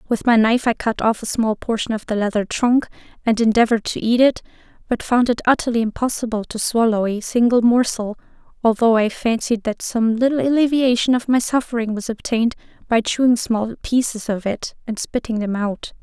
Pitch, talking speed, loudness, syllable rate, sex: 230 Hz, 185 wpm, -19 LUFS, 5.5 syllables/s, female